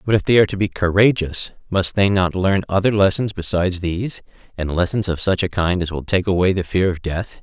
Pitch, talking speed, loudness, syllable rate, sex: 95 Hz, 235 wpm, -19 LUFS, 5.7 syllables/s, male